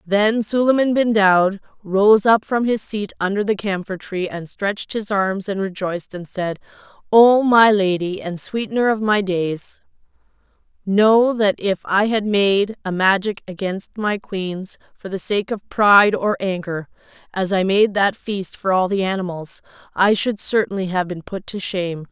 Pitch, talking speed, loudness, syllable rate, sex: 200 Hz, 175 wpm, -19 LUFS, 4.4 syllables/s, female